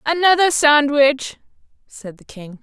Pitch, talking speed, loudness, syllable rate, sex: 280 Hz, 115 wpm, -15 LUFS, 3.9 syllables/s, female